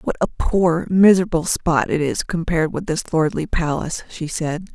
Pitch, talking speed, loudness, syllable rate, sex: 165 Hz, 175 wpm, -19 LUFS, 4.8 syllables/s, female